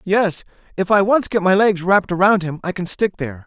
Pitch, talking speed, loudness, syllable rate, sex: 190 Hz, 225 wpm, -17 LUFS, 5.8 syllables/s, male